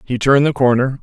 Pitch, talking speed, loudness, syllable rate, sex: 130 Hz, 235 wpm, -14 LUFS, 6.5 syllables/s, male